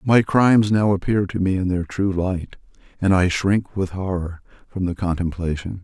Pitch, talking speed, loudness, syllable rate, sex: 95 Hz, 185 wpm, -20 LUFS, 4.8 syllables/s, male